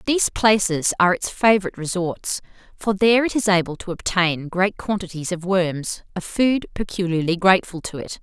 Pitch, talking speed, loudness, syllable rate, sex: 185 Hz, 170 wpm, -21 LUFS, 5.3 syllables/s, female